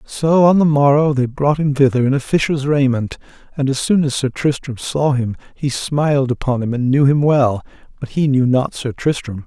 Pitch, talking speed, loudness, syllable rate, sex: 135 Hz, 215 wpm, -16 LUFS, 5.0 syllables/s, male